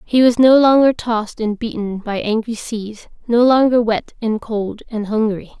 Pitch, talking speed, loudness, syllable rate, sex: 225 Hz, 180 wpm, -17 LUFS, 4.5 syllables/s, female